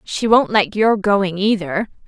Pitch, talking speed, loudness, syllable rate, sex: 200 Hz, 175 wpm, -17 LUFS, 3.8 syllables/s, female